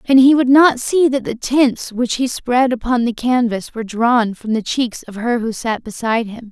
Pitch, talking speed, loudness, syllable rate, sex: 240 Hz, 230 wpm, -16 LUFS, 4.7 syllables/s, female